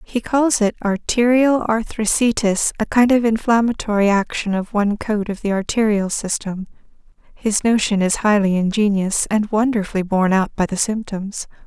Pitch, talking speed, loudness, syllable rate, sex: 210 Hz, 145 wpm, -18 LUFS, 5.0 syllables/s, female